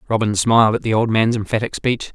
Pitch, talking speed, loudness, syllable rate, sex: 110 Hz, 225 wpm, -17 LUFS, 6.2 syllables/s, male